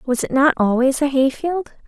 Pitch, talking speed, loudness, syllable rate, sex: 275 Hz, 225 wpm, -18 LUFS, 4.7 syllables/s, female